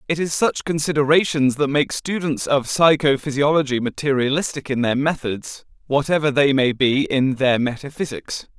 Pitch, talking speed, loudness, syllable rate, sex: 140 Hz, 140 wpm, -19 LUFS, 4.9 syllables/s, male